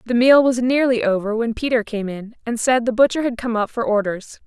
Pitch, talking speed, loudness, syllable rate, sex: 235 Hz, 240 wpm, -19 LUFS, 5.5 syllables/s, female